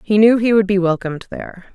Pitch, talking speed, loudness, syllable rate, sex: 200 Hz, 240 wpm, -15 LUFS, 6.5 syllables/s, female